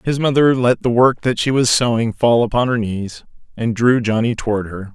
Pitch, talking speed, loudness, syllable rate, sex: 120 Hz, 220 wpm, -16 LUFS, 5.1 syllables/s, male